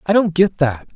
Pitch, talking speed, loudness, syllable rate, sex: 165 Hz, 250 wpm, -17 LUFS, 5.0 syllables/s, male